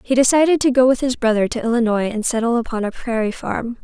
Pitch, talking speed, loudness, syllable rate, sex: 240 Hz, 235 wpm, -18 LUFS, 6.2 syllables/s, female